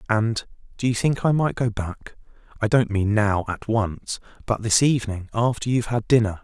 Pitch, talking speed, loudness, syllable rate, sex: 110 Hz, 185 wpm, -23 LUFS, 5.0 syllables/s, male